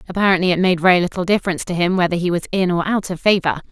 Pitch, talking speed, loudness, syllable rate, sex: 180 Hz, 260 wpm, -17 LUFS, 7.7 syllables/s, female